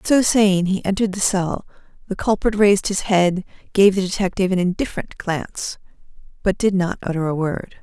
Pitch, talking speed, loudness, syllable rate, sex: 190 Hz, 175 wpm, -19 LUFS, 5.6 syllables/s, female